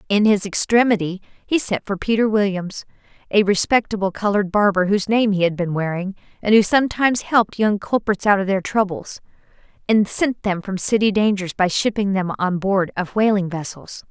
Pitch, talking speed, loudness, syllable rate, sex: 200 Hz, 180 wpm, -19 LUFS, 5.4 syllables/s, female